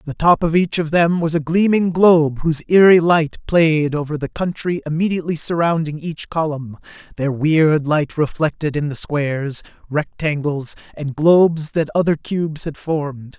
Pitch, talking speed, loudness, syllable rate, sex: 155 Hz, 160 wpm, -18 LUFS, 4.8 syllables/s, male